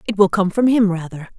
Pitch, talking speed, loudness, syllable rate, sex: 195 Hz, 260 wpm, -17 LUFS, 6.2 syllables/s, female